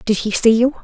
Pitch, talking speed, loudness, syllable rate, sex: 225 Hz, 290 wpm, -15 LUFS, 5.8 syllables/s, female